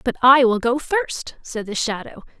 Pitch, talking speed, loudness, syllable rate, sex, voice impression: 250 Hz, 200 wpm, -19 LUFS, 4.4 syllables/s, female, very feminine, young, slightly adult-like, very thin, tensed, powerful, very bright, hard, very clear, very fluent, slightly raspy, very cute, intellectual, very refreshing, sincere, slightly calm, very friendly, reassuring, very unique, elegant, very wild, sweet, very lively, very strict, very intense, sharp, light